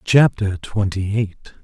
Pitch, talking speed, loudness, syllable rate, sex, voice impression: 105 Hz, 110 wpm, -20 LUFS, 3.9 syllables/s, male, masculine, middle-aged, slightly tensed, powerful, hard, slightly muffled, raspy, intellectual, mature, wild, lively, slightly strict